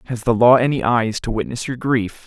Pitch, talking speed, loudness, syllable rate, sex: 120 Hz, 240 wpm, -18 LUFS, 5.3 syllables/s, male